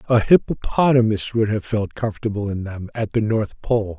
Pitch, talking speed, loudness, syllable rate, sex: 110 Hz, 180 wpm, -20 LUFS, 5.1 syllables/s, male